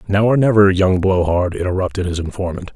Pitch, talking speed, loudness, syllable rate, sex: 95 Hz, 195 wpm, -16 LUFS, 5.8 syllables/s, male